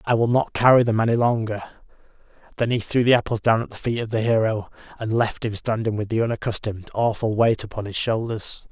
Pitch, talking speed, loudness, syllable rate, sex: 110 Hz, 215 wpm, -22 LUFS, 6.0 syllables/s, male